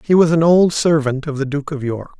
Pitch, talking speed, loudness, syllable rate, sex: 150 Hz, 275 wpm, -16 LUFS, 5.3 syllables/s, male